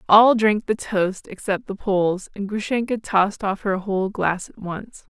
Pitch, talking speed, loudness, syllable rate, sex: 205 Hz, 185 wpm, -22 LUFS, 4.6 syllables/s, female